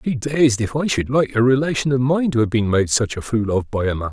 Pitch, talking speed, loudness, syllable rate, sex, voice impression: 125 Hz, 305 wpm, -19 LUFS, 5.7 syllables/s, male, masculine, very adult-like, slightly thick, sincere, calm, slightly wild